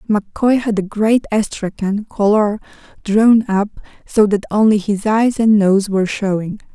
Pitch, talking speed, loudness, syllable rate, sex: 210 Hz, 150 wpm, -16 LUFS, 4.4 syllables/s, female